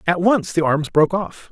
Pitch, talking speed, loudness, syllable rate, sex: 175 Hz, 235 wpm, -18 LUFS, 5.1 syllables/s, male